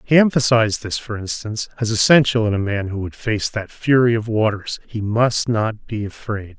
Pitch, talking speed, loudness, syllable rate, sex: 110 Hz, 200 wpm, -19 LUFS, 5.1 syllables/s, male